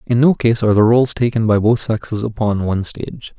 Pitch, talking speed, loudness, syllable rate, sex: 110 Hz, 230 wpm, -16 LUFS, 6.2 syllables/s, male